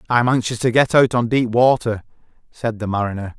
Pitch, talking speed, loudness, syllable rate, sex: 115 Hz, 195 wpm, -18 LUFS, 5.5 syllables/s, male